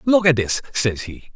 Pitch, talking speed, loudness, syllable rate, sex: 135 Hz, 220 wpm, -19 LUFS, 4.9 syllables/s, male